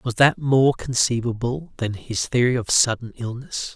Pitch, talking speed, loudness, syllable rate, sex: 125 Hz, 160 wpm, -21 LUFS, 4.5 syllables/s, male